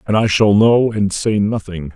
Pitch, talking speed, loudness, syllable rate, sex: 105 Hz, 215 wpm, -15 LUFS, 4.4 syllables/s, male